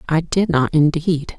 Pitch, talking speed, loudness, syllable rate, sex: 160 Hz, 175 wpm, -18 LUFS, 4.1 syllables/s, female